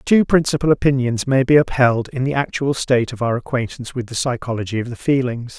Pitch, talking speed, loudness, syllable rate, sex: 130 Hz, 205 wpm, -18 LUFS, 6.0 syllables/s, male